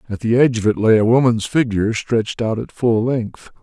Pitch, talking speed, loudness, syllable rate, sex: 115 Hz, 230 wpm, -17 LUFS, 5.7 syllables/s, male